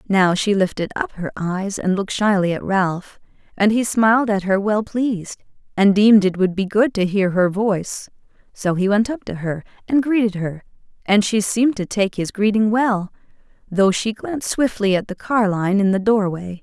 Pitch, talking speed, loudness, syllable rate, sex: 205 Hz, 200 wpm, -19 LUFS, 5.0 syllables/s, female